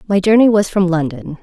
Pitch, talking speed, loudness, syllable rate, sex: 185 Hz, 210 wpm, -14 LUFS, 5.6 syllables/s, female